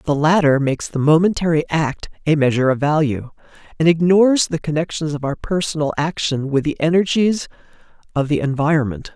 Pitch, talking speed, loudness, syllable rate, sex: 155 Hz, 155 wpm, -18 LUFS, 5.7 syllables/s, male